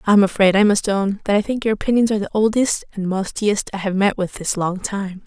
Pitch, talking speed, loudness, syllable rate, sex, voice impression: 200 Hz, 250 wpm, -19 LUFS, 5.7 syllables/s, female, very feminine, slightly young, slightly adult-like, very thin, slightly relaxed, slightly weak, slightly dark, soft, slightly clear, fluent, slightly raspy, cute, very intellectual, very refreshing, sincere, calm, friendly, reassuring, unique, elegant, slightly wild, very sweet, slightly lively, very kind, modest, light